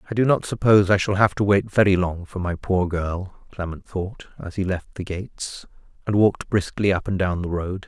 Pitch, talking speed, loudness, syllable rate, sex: 95 Hz, 230 wpm, -22 LUFS, 5.2 syllables/s, male